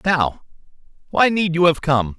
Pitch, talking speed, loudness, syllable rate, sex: 160 Hz, 165 wpm, -18 LUFS, 4.2 syllables/s, male